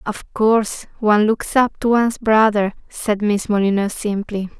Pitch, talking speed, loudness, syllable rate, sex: 210 Hz, 155 wpm, -18 LUFS, 4.6 syllables/s, female